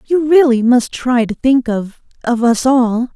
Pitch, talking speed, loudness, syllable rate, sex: 250 Hz, 170 wpm, -13 LUFS, 4.0 syllables/s, female